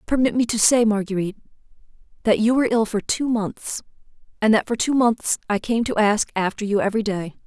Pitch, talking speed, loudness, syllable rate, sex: 220 Hz, 200 wpm, -21 LUFS, 5.9 syllables/s, female